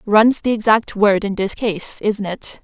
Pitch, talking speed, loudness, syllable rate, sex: 210 Hz, 205 wpm, -17 LUFS, 4.0 syllables/s, female